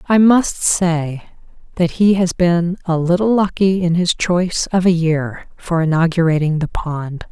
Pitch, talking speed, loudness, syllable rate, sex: 175 Hz, 165 wpm, -16 LUFS, 4.2 syllables/s, female